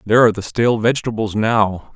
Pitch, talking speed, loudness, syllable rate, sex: 110 Hz, 185 wpm, -17 LUFS, 6.6 syllables/s, male